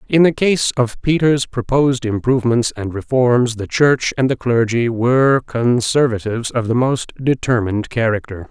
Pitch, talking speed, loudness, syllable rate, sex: 125 Hz, 150 wpm, -16 LUFS, 4.8 syllables/s, male